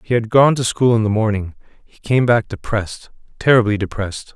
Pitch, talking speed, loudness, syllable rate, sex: 110 Hz, 195 wpm, -17 LUFS, 5.7 syllables/s, male